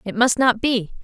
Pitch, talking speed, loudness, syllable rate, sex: 230 Hz, 230 wpm, -18 LUFS, 4.8 syllables/s, female